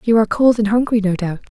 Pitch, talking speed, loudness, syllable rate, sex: 215 Hz, 270 wpm, -16 LUFS, 6.8 syllables/s, female